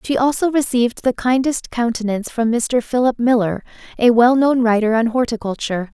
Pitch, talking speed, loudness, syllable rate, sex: 240 Hz, 150 wpm, -17 LUFS, 5.4 syllables/s, female